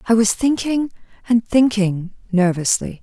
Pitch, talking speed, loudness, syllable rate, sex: 220 Hz, 100 wpm, -18 LUFS, 4.3 syllables/s, female